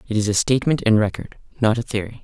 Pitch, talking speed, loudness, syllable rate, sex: 110 Hz, 240 wpm, -20 LUFS, 7.0 syllables/s, male